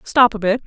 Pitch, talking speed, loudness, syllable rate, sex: 225 Hz, 270 wpm, -16 LUFS, 5.6 syllables/s, female